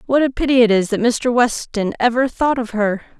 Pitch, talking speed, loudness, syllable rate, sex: 235 Hz, 225 wpm, -17 LUFS, 5.3 syllables/s, female